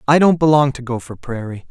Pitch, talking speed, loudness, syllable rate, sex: 135 Hz, 210 wpm, -17 LUFS, 5.8 syllables/s, male